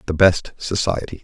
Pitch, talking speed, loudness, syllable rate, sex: 90 Hz, 145 wpm, -19 LUFS, 4.8 syllables/s, male